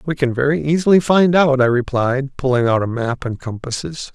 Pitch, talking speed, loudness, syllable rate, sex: 135 Hz, 205 wpm, -17 LUFS, 5.2 syllables/s, male